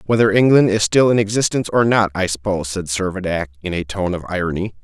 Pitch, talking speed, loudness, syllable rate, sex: 100 Hz, 210 wpm, -17 LUFS, 6.4 syllables/s, male